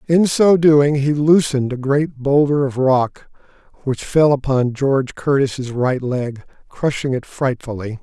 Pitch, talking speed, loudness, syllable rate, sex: 135 Hz, 150 wpm, -17 LUFS, 4.1 syllables/s, male